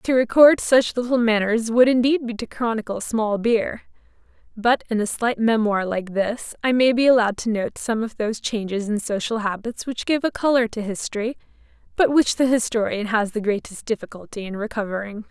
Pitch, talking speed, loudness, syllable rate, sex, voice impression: 225 Hz, 190 wpm, -21 LUFS, 5.3 syllables/s, female, feminine, adult-like, tensed, powerful, slightly bright, slightly clear, raspy, intellectual, elegant, lively, sharp